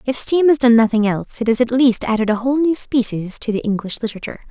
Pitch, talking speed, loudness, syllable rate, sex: 235 Hz, 240 wpm, -17 LUFS, 6.6 syllables/s, female